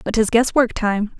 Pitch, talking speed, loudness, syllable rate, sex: 220 Hz, 200 wpm, -18 LUFS, 4.7 syllables/s, female